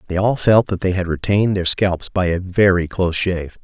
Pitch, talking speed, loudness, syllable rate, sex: 95 Hz, 230 wpm, -18 LUFS, 5.6 syllables/s, male